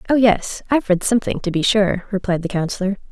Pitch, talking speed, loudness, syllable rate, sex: 200 Hz, 210 wpm, -19 LUFS, 6.3 syllables/s, female